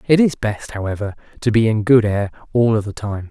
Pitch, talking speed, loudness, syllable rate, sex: 110 Hz, 235 wpm, -18 LUFS, 5.6 syllables/s, male